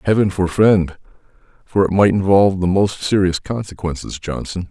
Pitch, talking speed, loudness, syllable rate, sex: 95 Hz, 140 wpm, -17 LUFS, 5.1 syllables/s, male